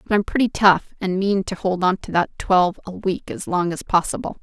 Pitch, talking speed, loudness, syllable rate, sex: 185 Hz, 230 wpm, -20 LUFS, 5.4 syllables/s, female